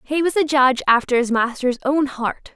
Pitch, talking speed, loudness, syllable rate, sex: 265 Hz, 210 wpm, -19 LUFS, 5.1 syllables/s, female